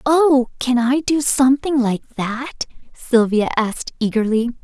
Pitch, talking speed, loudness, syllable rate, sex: 255 Hz, 130 wpm, -18 LUFS, 4.0 syllables/s, female